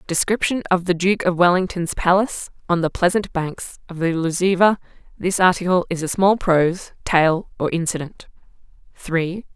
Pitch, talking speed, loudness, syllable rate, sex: 175 Hz, 150 wpm, -19 LUFS, 4.9 syllables/s, female